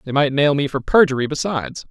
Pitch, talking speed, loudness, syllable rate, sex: 140 Hz, 220 wpm, -18 LUFS, 6.3 syllables/s, male